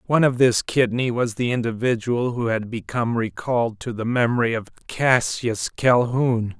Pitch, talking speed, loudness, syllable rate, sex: 120 Hz, 155 wpm, -21 LUFS, 4.9 syllables/s, male